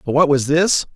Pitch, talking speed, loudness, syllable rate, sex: 150 Hz, 250 wpm, -16 LUFS, 5.1 syllables/s, male